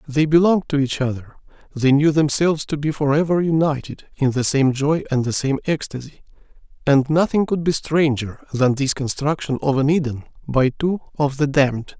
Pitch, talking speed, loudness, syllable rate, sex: 145 Hz, 185 wpm, -19 LUFS, 5.2 syllables/s, male